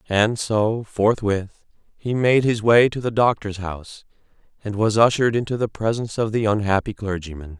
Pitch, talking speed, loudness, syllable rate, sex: 110 Hz, 165 wpm, -20 LUFS, 5.1 syllables/s, male